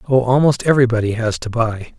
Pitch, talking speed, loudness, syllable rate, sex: 120 Hz, 180 wpm, -16 LUFS, 6.2 syllables/s, male